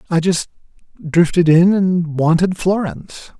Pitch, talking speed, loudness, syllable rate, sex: 170 Hz, 125 wpm, -15 LUFS, 4.5 syllables/s, male